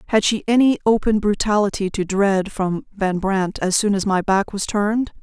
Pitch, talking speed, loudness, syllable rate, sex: 200 Hz, 195 wpm, -19 LUFS, 4.8 syllables/s, female